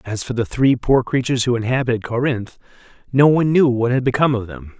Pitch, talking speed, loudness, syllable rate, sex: 120 Hz, 215 wpm, -18 LUFS, 6.5 syllables/s, male